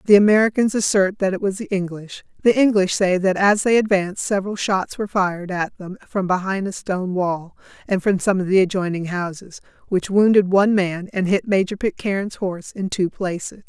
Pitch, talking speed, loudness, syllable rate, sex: 190 Hz, 195 wpm, -20 LUFS, 5.5 syllables/s, female